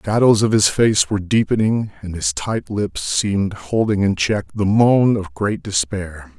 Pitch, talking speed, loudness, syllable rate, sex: 100 Hz, 190 wpm, -18 LUFS, 4.4 syllables/s, male